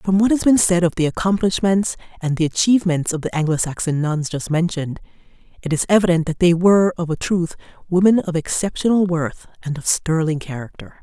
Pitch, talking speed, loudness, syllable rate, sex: 170 Hz, 185 wpm, -18 LUFS, 5.7 syllables/s, female